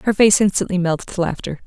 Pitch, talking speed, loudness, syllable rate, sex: 190 Hz, 215 wpm, -18 LUFS, 6.3 syllables/s, female